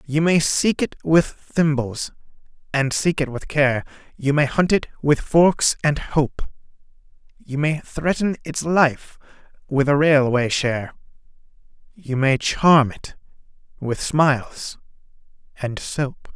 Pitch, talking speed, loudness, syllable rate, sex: 145 Hz, 130 wpm, -20 LUFS, 3.7 syllables/s, male